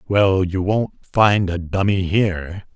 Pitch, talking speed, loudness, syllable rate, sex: 95 Hz, 155 wpm, -19 LUFS, 3.6 syllables/s, male